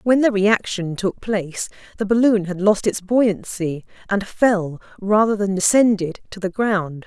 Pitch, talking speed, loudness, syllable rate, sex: 200 Hz, 170 wpm, -19 LUFS, 4.4 syllables/s, female